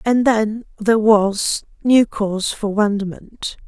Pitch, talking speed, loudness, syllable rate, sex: 215 Hz, 130 wpm, -18 LUFS, 3.8 syllables/s, female